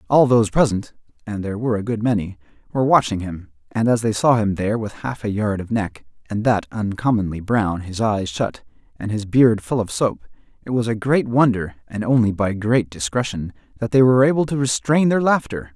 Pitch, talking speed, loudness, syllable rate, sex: 110 Hz, 210 wpm, -20 LUFS, 5.5 syllables/s, male